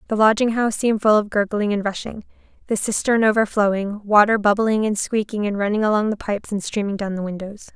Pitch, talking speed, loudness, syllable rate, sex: 210 Hz, 200 wpm, -20 LUFS, 6.1 syllables/s, female